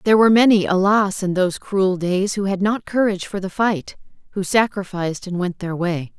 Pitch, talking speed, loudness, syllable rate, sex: 190 Hz, 205 wpm, -19 LUFS, 5.5 syllables/s, female